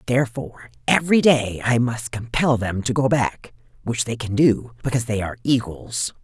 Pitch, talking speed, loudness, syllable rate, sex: 120 Hz, 175 wpm, -21 LUFS, 5.2 syllables/s, female